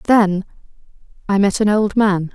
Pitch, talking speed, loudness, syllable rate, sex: 200 Hz, 155 wpm, -16 LUFS, 4.4 syllables/s, female